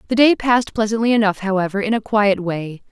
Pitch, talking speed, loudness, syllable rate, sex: 210 Hz, 205 wpm, -18 LUFS, 6.0 syllables/s, female